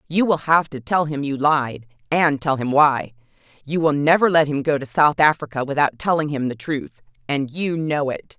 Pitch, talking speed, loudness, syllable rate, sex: 145 Hz, 200 wpm, -20 LUFS, 4.9 syllables/s, female